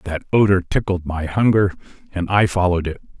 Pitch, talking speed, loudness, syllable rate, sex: 90 Hz, 170 wpm, -19 LUFS, 5.7 syllables/s, male